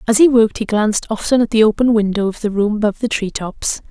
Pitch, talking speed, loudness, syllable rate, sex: 215 Hz, 260 wpm, -16 LUFS, 6.6 syllables/s, female